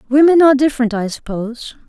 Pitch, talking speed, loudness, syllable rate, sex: 260 Hz, 160 wpm, -14 LUFS, 6.9 syllables/s, female